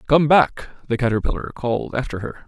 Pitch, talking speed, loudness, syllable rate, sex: 130 Hz, 170 wpm, -20 LUFS, 6.2 syllables/s, male